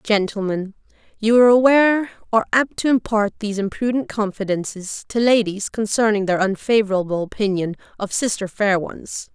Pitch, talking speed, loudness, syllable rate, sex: 210 Hz, 135 wpm, -19 LUFS, 5.3 syllables/s, female